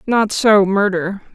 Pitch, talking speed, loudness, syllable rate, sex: 200 Hz, 135 wpm, -15 LUFS, 3.6 syllables/s, female